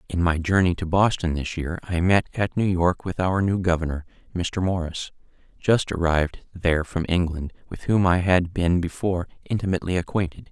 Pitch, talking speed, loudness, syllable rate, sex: 90 Hz, 175 wpm, -23 LUFS, 5.2 syllables/s, male